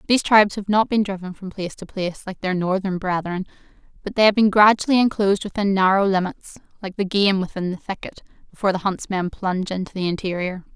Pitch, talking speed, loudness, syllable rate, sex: 195 Hz, 200 wpm, -21 LUFS, 6.3 syllables/s, female